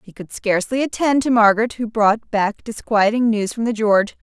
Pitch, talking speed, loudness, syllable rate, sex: 220 Hz, 195 wpm, -18 LUFS, 5.4 syllables/s, female